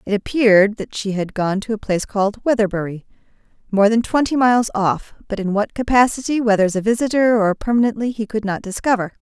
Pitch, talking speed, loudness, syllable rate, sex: 215 Hz, 190 wpm, -18 LUFS, 6.1 syllables/s, female